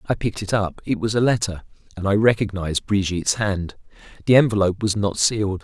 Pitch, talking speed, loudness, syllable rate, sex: 100 Hz, 190 wpm, -21 LUFS, 6.2 syllables/s, male